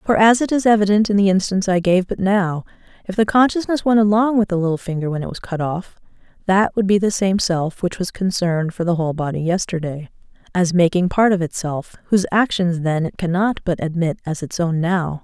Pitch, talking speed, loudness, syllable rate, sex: 185 Hz, 220 wpm, -18 LUFS, 5.7 syllables/s, female